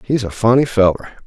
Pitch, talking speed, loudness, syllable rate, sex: 115 Hz, 190 wpm, -15 LUFS, 7.0 syllables/s, male